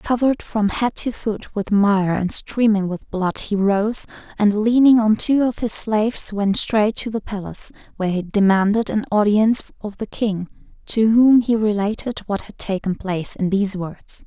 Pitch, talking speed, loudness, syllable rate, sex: 210 Hz, 185 wpm, -19 LUFS, 4.7 syllables/s, female